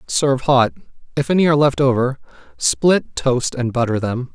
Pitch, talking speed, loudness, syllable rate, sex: 135 Hz, 165 wpm, -18 LUFS, 5.0 syllables/s, male